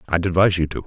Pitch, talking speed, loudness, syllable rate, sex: 90 Hz, 280 wpm, -19 LUFS, 9.0 syllables/s, male